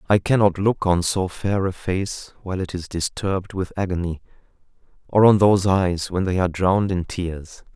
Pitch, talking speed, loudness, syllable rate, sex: 95 Hz, 185 wpm, -21 LUFS, 5.1 syllables/s, male